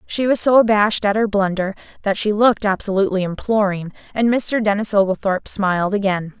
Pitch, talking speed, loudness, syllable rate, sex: 205 Hz, 170 wpm, -18 LUFS, 5.9 syllables/s, female